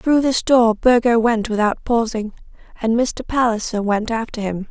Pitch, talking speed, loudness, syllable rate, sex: 230 Hz, 165 wpm, -18 LUFS, 4.7 syllables/s, female